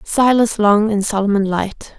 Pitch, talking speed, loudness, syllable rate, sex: 210 Hz, 150 wpm, -15 LUFS, 4.3 syllables/s, female